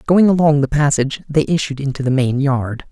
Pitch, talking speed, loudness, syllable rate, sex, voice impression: 140 Hz, 205 wpm, -16 LUFS, 5.6 syllables/s, male, slightly masculine, adult-like, soft, slightly muffled, sincere, calm, kind